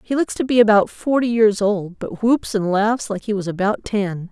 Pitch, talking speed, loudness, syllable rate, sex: 210 Hz, 235 wpm, -19 LUFS, 4.8 syllables/s, female